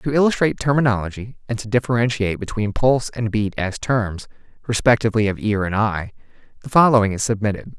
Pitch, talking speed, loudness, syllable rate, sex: 115 Hz, 160 wpm, -20 LUFS, 6.2 syllables/s, male